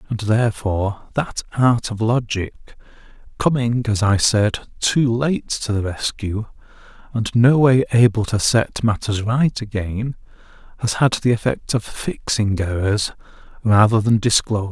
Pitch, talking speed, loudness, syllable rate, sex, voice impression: 110 Hz, 145 wpm, -19 LUFS, 4.4 syllables/s, male, masculine, adult-like, slightly cool, slightly intellectual, sincere, slightly calm